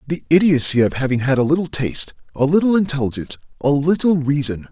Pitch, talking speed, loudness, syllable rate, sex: 145 Hz, 180 wpm, -18 LUFS, 6.3 syllables/s, male